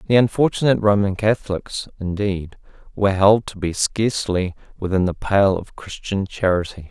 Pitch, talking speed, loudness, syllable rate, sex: 100 Hz, 140 wpm, -20 LUFS, 5.1 syllables/s, male